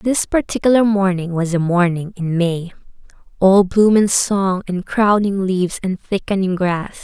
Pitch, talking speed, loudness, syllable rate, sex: 190 Hz, 145 wpm, -17 LUFS, 4.4 syllables/s, female